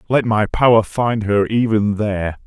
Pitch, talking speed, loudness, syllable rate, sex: 110 Hz, 170 wpm, -17 LUFS, 4.4 syllables/s, male